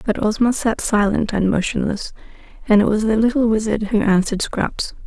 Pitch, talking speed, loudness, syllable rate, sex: 215 Hz, 180 wpm, -18 LUFS, 5.3 syllables/s, female